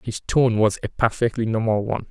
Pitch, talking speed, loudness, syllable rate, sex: 115 Hz, 200 wpm, -21 LUFS, 5.6 syllables/s, male